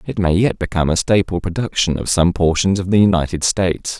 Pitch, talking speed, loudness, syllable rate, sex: 90 Hz, 210 wpm, -17 LUFS, 5.9 syllables/s, male